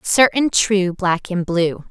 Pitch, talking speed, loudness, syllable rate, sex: 190 Hz, 160 wpm, -17 LUFS, 3.3 syllables/s, female